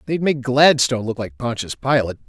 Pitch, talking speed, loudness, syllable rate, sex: 125 Hz, 185 wpm, -18 LUFS, 5.9 syllables/s, male